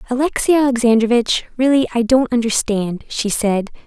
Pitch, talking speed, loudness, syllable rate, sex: 240 Hz, 125 wpm, -16 LUFS, 5.2 syllables/s, female